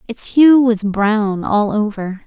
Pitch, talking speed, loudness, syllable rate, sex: 220 Hz, 160 wpm, -14 LUFS, 3.4 syllables/s, female